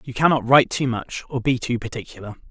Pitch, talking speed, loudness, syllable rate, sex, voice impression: 125 Hz, 215 wpm, -21 LUFS, 6.3 syllables/s, male, masculine, adult-like, tensed, powerful, slightly hard, clear, raspy, friendly, slightly unique, wild, lively, intense